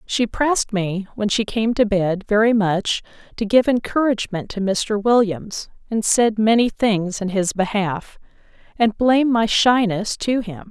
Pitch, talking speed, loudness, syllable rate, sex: 215 Hz, 160 wpm, -19 LUFS, 4.3 syllables/s, female